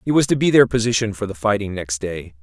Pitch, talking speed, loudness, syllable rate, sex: 105 Hz, 270 wpm, -19 LUFS, 6.2 syllables/s, male